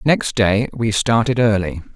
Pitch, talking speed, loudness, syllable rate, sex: 110 Hz, 155 wpm, -17 LUFS, 4.1 syllables/s, male